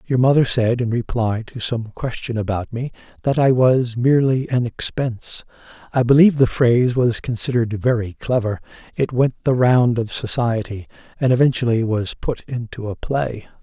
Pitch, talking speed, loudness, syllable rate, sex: 120 Hz, 165 wpm, -19 LUFS, 5.0 syllables/s, male